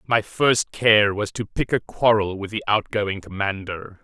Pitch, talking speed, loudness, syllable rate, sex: 105 Hz, 180 wpm, -21 LUFS, 4.1 syllables/s, male